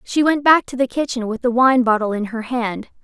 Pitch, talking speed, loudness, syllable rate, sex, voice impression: 245 Hz, 255 wpm, -18 LUFS, 5.3 syllables/s, female, feminine, slightly young, tensed, powerful, bright, clear, fluent, intellectual, friendly, lively, light